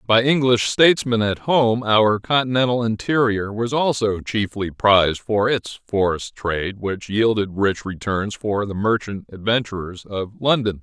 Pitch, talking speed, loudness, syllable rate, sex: 110 Hz, 145 wpm, -20 LUFS, 4.5 syllables/s, male